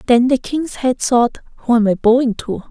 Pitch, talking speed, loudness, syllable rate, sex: 245 Hz, 220 wpm, -16 LUFS, 4.9 syllables/s, female